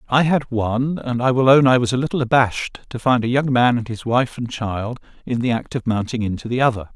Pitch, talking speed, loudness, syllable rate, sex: 125 Hz, 260 wpm, -19 LUFS, 5.8 syllables/s, male